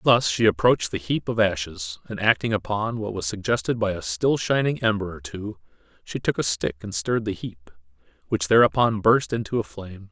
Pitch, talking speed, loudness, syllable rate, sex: 100 Hz, 200 wpm, -23 LUFS, 5.4 syllables/s, male